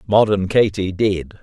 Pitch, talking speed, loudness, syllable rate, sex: 100 Hz, 125 wpm, -18 LUFS, 3.9 syllables/s, male